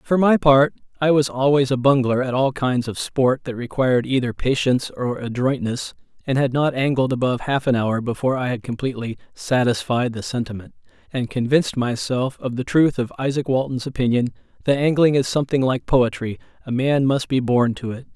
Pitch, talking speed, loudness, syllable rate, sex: 130 Hz, 185 wpm, -20 LUFS, 5.5 syllables/s, male